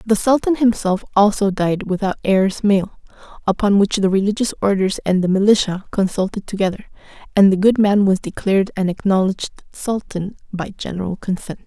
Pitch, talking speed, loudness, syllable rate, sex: 200 Hz, 155 wpm, -18 LUFS, 5.3 syllables/s, female